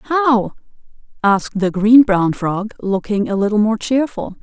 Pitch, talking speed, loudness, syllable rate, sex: 220 Hz, 150 wpm, -16 LUFS, 4.2 syllables/s, female